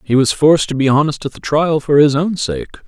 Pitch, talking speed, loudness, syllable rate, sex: 145 Hz, 270 wpm, -14 LUFS, 5.8 syllables/s, male